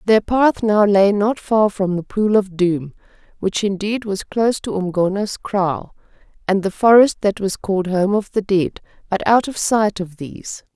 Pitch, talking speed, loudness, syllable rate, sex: 200 Hz, 190 wpm, -18 LUFS, 4.5 syllables/s, female